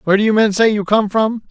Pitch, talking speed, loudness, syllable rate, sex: 210 Hz, 320 wpm, -15 LUFS, 6.5 syllables/s, male